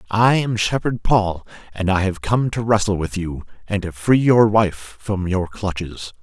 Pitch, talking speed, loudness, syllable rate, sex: 100 Hz, 195 wpm, -19 LUFS, 4.2 syllables/s, male